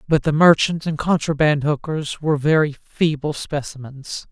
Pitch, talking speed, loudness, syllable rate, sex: 150 Hz, 140 wpm, -19 LUFS, 4.6 syllables/s, male